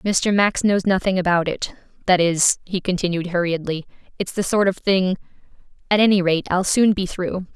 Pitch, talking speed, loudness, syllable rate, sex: 185 Hz, 175 wpm, -20 LUFS, 5.0 syllables/s, female